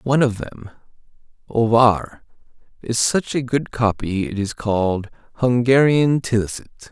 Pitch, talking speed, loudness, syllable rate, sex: 115 Hz, 120 wpm, -19 LUFS, 4.3 syllables/s, male